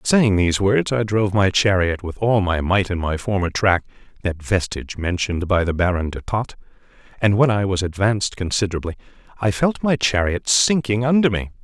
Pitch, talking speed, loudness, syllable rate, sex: 100 Hz, 185 wpm, -20 LUFS, 5.4 syllables/s, male